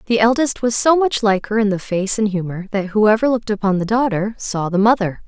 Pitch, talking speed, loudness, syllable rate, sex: 210 Hz, 240 wpm, -17 LUFS, 5.6 syllables/s, female